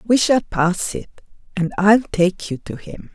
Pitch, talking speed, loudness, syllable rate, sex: 200 Hz, 190 wpm, -18 LUFS, 3.7 syllables/s, female